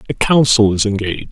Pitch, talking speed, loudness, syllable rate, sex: 110 Hz, 180 wpm, -14 LUFS, 6.3 syllables/s, male